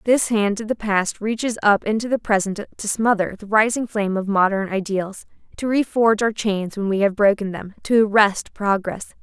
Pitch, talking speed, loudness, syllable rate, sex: 210 Hz, 195 wpm, -20 LUFS, 5.1 syllables/s, female